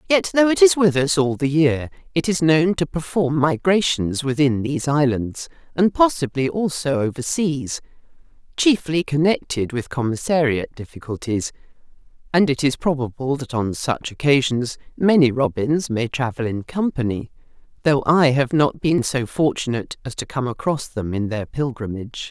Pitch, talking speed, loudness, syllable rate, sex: 140 Hz, 150 wpm, -20 LUFS, 4.8 syllables/s, female